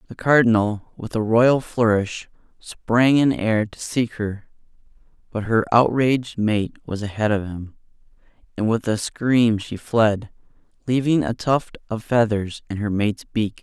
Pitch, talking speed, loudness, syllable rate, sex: 110 Hz, 155 wpm, -21 LUFS, 4.1 syllables/s, male